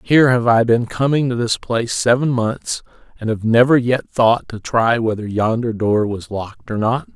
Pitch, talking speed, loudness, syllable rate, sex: 115 Hz, 200 wpm, -17 LUFS, 4.8 syllables/s, male